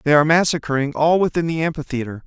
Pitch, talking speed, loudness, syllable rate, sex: 155 Hz, 185 wpm, -19 LUFS, 6.5 syllables/s, male